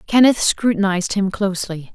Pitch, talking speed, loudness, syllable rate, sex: 200 Hz, 125 wpm, -18 LUFS, 5.5 syllables/s, female